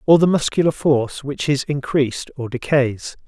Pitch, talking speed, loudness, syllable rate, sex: 140 Hz, 165 wpm, -19 LUFS, 5.0 syllables/s, male